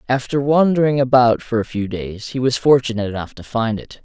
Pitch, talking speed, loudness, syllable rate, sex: 125 Hz, 210 wpm, -18 LUFS, 5.7 syllables/s, male